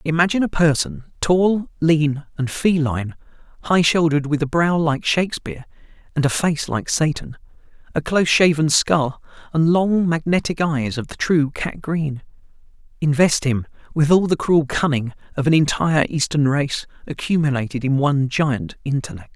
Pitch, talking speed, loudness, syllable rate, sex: 155 Hz, 150 wpm, -19 LUFS, 5.0 syllables/s, male